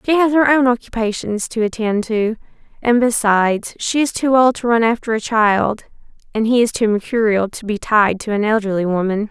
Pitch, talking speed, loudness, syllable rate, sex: 225 Hz, 200 wpm, -17 LUFS, 5.2 syllables/s, female